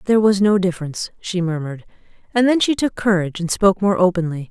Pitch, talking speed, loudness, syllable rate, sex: 190 Hz, 200 wpm, -18 LUFS, 6.8 syllables/s, female